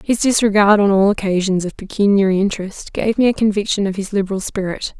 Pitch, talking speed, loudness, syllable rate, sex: 200 Hz, 190 wpm, -17 LUFS, 6.1 syllables/s, female